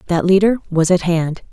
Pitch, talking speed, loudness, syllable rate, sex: 175 Hz, 195 wpm, -16 LUFS, 5.3 syllables/s, female